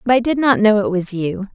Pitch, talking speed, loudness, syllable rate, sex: 215 Hz, 310 wpm, -16 LUFS, 5.6 syllables/s, female